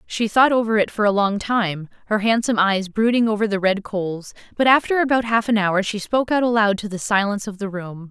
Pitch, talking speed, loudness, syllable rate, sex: 210 Hz, 235 wpm, -19 LUFS, 5.8 syllables/s, female